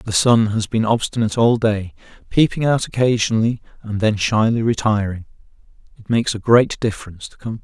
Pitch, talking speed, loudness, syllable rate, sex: 110 Hz, 165 wpm, -18 LUFS, 5.8 syllables/s, male